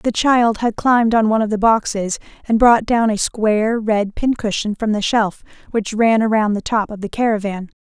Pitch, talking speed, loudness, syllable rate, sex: 220 Hz, 205 wpm, -17 LUFS, 4.9 syllables/s, female